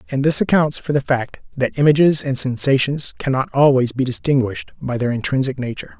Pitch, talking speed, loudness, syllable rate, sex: 135 Hz, 180 wpm, -18 LUFS, 5.8 syllables/s, male